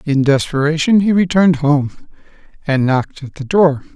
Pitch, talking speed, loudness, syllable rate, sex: 150 Hz, 150 wpm, -14 LUFS, 5.1 syllables/s, male